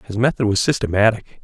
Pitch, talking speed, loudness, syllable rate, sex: 110 Hz, 165 wpm, -18 LUFS, 7.1 syllables/s, male